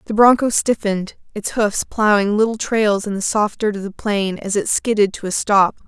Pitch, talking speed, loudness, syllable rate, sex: 210 Hz, 215 wpm, -18 LUFS, 5.0 syllables/s, female